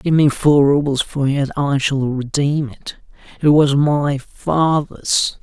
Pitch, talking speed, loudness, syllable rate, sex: 140 Hz, 155 wpm, -17 LUFS, 3.5 syllables/s, male